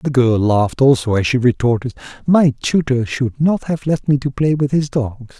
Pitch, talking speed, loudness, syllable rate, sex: 130 Hz, 210 wpm, -16 LUFS, 4.8 syllables/s, male